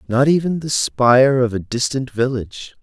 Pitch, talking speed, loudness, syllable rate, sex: 130 Hz, 170 wpm, -17 LUFS, 5.0 syllables/s, male